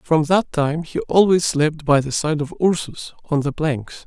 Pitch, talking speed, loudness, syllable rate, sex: 155 Hz, 205 wpm, -19 LUFS, 4.2 syllables/s, male